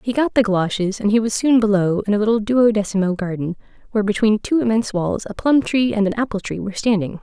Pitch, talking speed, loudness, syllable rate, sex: 215 Hz, 225 wpm, -19 LUFS, 6.4 syllables/s, female